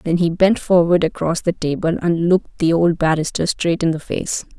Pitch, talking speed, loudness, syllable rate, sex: 170 Hz, 210 wpm, -18 LUFS, 5.1 syllables/s, female